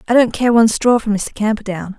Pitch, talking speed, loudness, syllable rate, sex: 220 Hz, 240 wpm, -15 LUFS, 6.3 syllables/s, female